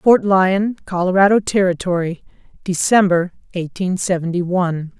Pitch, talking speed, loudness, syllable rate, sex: 185 Hz, 95 wpm, -17 LUFS, 4.7 syllables/s, female